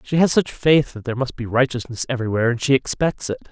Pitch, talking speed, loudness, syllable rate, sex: 130 Hz, 240 wpm, -20 LUFS, 6.7 syllables/s, male